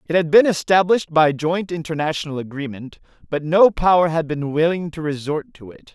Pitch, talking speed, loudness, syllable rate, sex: 160 Hz, 180 wpm, -19 LUFS, 5.5 syllables/s, male